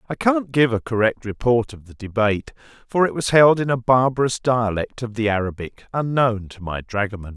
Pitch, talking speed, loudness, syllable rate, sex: 120 Hz, 195 wpm, -20 LUFS, 5.3 syllables/s, male